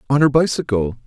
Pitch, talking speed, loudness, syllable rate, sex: 125 Hz, 170 wpm, -17 LUFS, 6.1 syllables/s, male